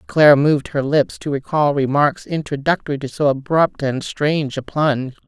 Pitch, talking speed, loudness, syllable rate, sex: 145 Hz, 170 wpm, -18 LUFS, 5.2 syllables/s, female